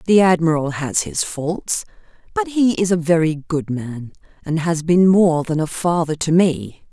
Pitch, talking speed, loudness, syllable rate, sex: 165 Hz, 180 wpm, -18 LUFS, 4.2 syllables/s, female